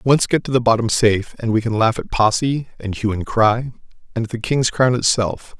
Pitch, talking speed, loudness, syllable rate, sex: 115 Hz, 235 wpm, -18 LUFS, 5.3 syllables/s, male